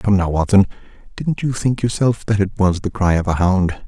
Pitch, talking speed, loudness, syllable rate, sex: 100 Hz, 230 wpm, -18 LUFS, 5.2 syllables/s, male